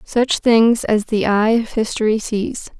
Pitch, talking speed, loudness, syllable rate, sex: 225 Hz, 170 wpm, -17 LUFS, 3.8 syllables/s, female